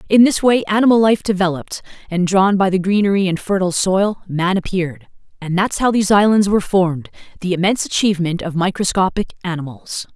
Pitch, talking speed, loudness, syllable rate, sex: 190 Hz, 170 wpm, -16 LUFS, 6.1 syllables/s, female